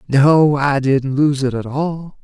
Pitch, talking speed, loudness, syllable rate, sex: 140 Hz, 160 wpm, -16 LUFS, 2.9 syllables/s, male